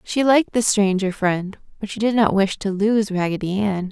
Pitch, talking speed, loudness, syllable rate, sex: 205 Hz, 215 wpm, -19 LUFS, 5.0 syllables/s, female